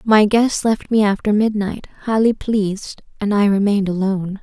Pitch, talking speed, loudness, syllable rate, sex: 205 Hz, 165 wpm, -17 LUFS, 5.1 syllables/s, female